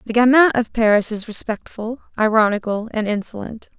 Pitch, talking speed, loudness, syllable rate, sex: 225 Hz, 145 wpm, -18 LUFS, 5.4 syllables/s, female